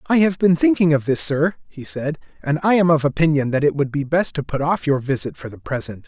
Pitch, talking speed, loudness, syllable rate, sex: 155 Hz, 265 wpm, -19 LUFS, 5.8 syllables/s, male